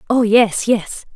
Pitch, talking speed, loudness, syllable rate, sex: 215 Hz, 155 wpm, -15 LUFS, 3.4 syllables/s, female